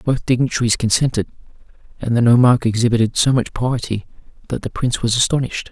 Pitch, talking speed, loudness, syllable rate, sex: 120 Hz, 160 wpm, -17 LUFS, 6.5 syllables/s, male